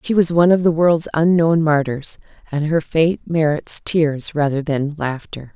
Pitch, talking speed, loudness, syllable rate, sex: 155 Hz, 175 wpm, -17 LUFS, 4.4 syllables/s, female